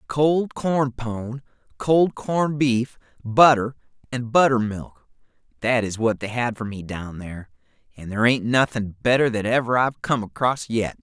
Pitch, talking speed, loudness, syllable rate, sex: 120 Hz, 160 wpm, -22 LUFS, 4.4 syllables/s, male